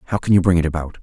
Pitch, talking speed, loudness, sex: 85 Hz, 350 wpm, -17 LUFS, male